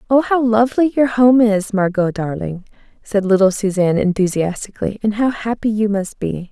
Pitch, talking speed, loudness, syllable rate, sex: 210 Hz, 165 wpm, -17 LUFS, 5.3 syllables/s, female